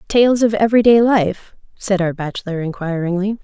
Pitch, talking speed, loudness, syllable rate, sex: 200 Hz, 155 wpm, -16 LUFS, 5.3 syllables/s, female